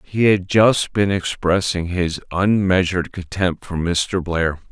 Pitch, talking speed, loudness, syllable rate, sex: 90 Hz, 140 wpm, -19 LUFS, 3.8 syllables/s, male